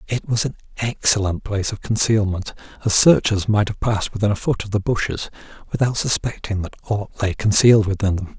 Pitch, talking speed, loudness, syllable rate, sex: 105 Hz, 185 wpm, -19 LUFS, 5.9 syllables/s, male